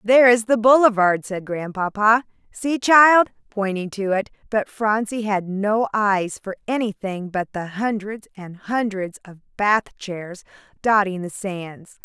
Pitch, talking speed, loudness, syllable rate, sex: 205 Hz, 145 wpm, -20 LUFS, 4.0 syllables/s, female